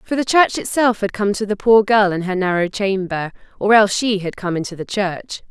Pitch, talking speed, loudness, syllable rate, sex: 200 Hz, 240 wpm, -17 LUFS, 5.3 syllables/s, female